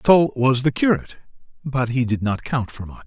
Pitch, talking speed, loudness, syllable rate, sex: 130 Hz, 215 wpm, -20 LUFS, 5.3 syllables/s, male